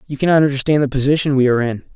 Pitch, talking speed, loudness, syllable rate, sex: 140 Hz, 245 wpm, -16 LUFS, 8.1 syllables/s, male